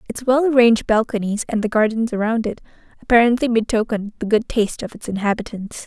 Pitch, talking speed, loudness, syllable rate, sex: 225 Hz, 175 wpm, -19 LUFS, 6.4 syllables/s, female